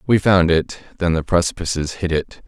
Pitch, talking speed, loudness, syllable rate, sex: 85 Hz, 195 wpm, -19 LUFS, 5.1 syllables/s, male